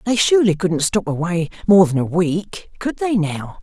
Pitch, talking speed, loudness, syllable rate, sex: 185 Hz, 200 wpm, -18 LUFS, 4.7 syllables/s, female